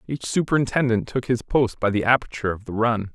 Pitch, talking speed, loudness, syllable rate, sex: 115 Hz, 210 wpm, -22 LUFS, 6.0 syllables/s, male